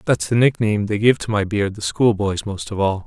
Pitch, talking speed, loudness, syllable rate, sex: 105 Hz, 255 wpm, -19 LUFS, 5.5 syllables/s, male